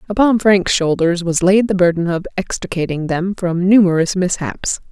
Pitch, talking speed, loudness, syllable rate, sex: 185 Hz, 160 wpm, -16 LUFS, 4.8 syllables/s, female